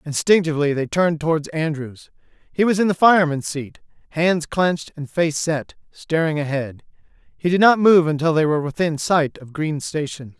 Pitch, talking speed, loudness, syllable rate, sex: 160 Hz, 175 wpm, -19 LUFS, 5.2 syllables/s, male